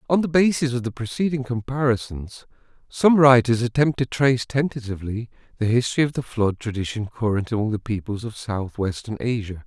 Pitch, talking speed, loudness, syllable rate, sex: 120 Hz, 160 wpm, -22 LUFS, 5.7 syllables/s, male